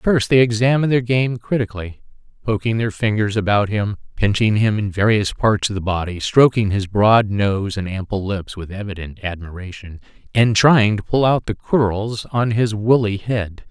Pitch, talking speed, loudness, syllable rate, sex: 105 Hz, 180 wpm, -18 LUFS, 4.8 syllables/s, male